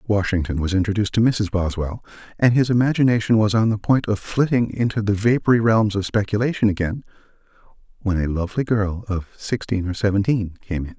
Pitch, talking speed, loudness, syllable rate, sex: 105 Hz, 175 wpm, -20 LUFS, 5.9 syllables/s, male